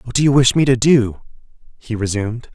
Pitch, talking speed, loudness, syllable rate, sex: 125 Hz, 210 wpm, -16 LUFS, 5.9 syllables/s, male